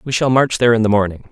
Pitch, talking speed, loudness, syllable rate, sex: 115 Hz, 320 wpm, -15 LUFS, 7.4 syllables/s, male